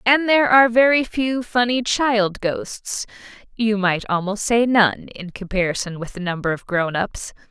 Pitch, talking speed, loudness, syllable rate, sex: 215 Hz, 160 wpm, -19 LUFS, 4.5 syllables/s, female